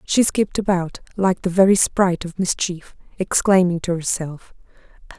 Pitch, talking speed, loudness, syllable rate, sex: 180 Hz, 140 wpm, -19 LUFS, 4.9 syllables/s, female